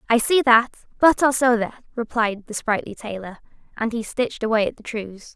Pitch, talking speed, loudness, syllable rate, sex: 230 Hz, 200 wpm, -21 LUFS, 5.3 syllables/s, female